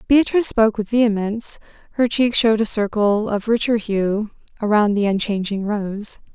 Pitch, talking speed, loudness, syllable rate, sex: 215 Hz, 150 wpm, -19 LUFS, 5.2 syllables/s, female